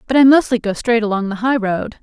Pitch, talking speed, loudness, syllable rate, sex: 225 Hz, 265 wpm, -16 LUFS, 6.0 syllables/s, female